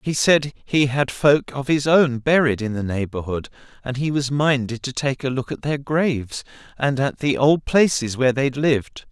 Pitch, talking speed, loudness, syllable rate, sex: 135 Hz, 205 wpm, -20 LUFS, 4.7 syllables/s, male